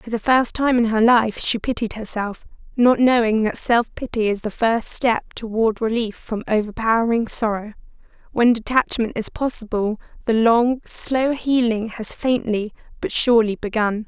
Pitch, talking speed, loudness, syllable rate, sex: 230 Hz, 160 wpm, -19 LUFS, 4.6 syllables/s, female